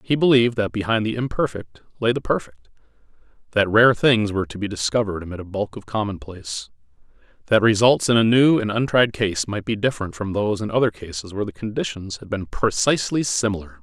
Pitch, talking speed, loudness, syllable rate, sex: 105 Hz, 190 wpm, -21 LUFS, 6.1 syllables/s, male